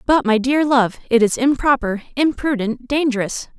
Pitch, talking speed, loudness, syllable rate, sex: 255 Hz, 150 wpm, -18 LUFS, 4.8 syllables/s, female